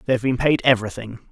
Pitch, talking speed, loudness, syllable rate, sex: 120 Hz, 275 wpm, -19 LUFS, 7.0 syllables/s, male